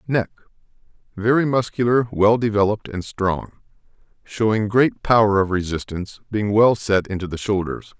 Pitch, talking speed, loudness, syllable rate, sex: 105 Hz, 130 wpm, -20 LUFS, 5.1 syllables/s, male